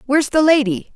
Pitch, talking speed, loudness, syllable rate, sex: 285 Hz, 190 wpm, -16 LUFS, 6.6 syllables/s, female